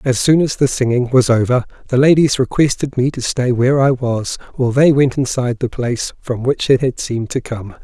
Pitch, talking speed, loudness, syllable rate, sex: 130 Hz, 220 wpm, -16 LUFS, 5.6 syllables/s, male